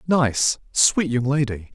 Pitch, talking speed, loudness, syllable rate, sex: 135 Hz, 140 wpm, -20 LUFS, 3.4 syllables/s, male